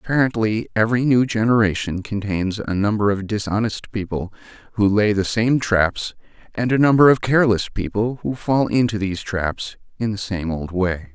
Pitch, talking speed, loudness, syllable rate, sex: 105 Hz, 165 wpm, -20 LUFS, 5.1 syllables/s, male